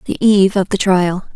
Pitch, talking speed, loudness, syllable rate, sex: 195 Hz, 220 wpm, -14 LUFS, 5.4 syllables/s, female